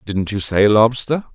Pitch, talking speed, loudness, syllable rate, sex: 110 Hz, 180 wpm, -16 LUFS, 4.3 syllables/s, male